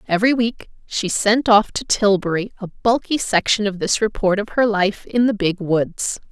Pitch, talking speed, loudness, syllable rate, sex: 205 Hz, 190 wpm, -19 LUFS, 4.6 syllables/s, female